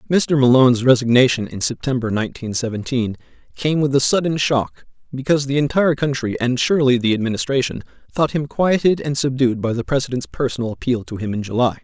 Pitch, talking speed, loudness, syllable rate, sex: 130 Hz, 170 wpm, -18 LUFS, 6.1 syllables/s, male